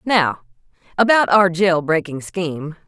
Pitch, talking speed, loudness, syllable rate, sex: 175 Hz, 125 wpm, -17 LUFS, 4.2 syllables/s, female